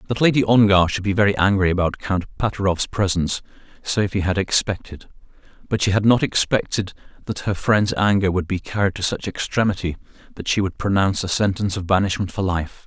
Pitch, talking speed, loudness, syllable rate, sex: 100 Hz, 180 wpm, -20 LUFS, 5.9 syllables/s, male